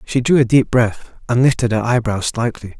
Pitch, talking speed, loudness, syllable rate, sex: 120 Hz, 215 wpm, -16 LUFS, 5.2 syllables/s, male